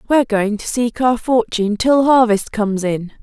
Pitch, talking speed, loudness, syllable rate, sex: 235 Hz, 185 wpm, -16 LUFS, 5.0 syllables/s, female